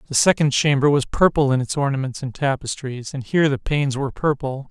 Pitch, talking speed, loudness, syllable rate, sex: 140 Hz, 205 wpm, -20 LUFS, 6.0 syllables/s, male